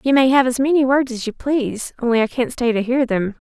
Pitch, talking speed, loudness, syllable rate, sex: 250 Hz, 260 wpm, -18 LUFS, 5.8 syllables/s, female